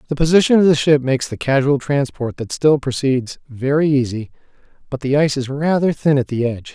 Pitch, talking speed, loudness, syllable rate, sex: 140 Hz, 205 wpm, -17 LUFS, 5.8 syllables/s, male